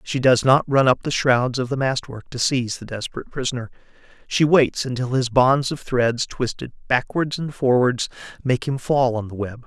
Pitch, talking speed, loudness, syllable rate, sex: 125 Hz, 205 wpm, -21 LUFS, 5.1 syllables/s, male